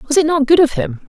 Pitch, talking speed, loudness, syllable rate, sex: 310 Hz, 300 wpm, -14 LUFS, 5.7 syllables/s, female